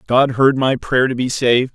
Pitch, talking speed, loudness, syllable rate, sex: 130 Hz, 240 wpm, -16 LUFS, 5.0 syllables/s, male